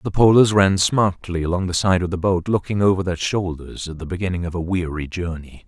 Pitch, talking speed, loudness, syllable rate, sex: 90 Hz, 220 wpm, -20 LUFS, 5.8 syllables/s, male